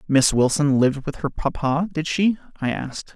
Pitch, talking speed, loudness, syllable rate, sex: 145 Hz, 190 wpm, -21 LUFS, 5.1 syllables/s, male